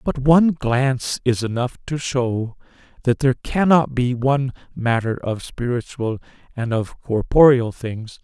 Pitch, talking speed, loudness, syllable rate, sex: 125 Hz, 140 wpm, -20 LUFS, 4.4 syllables/s, male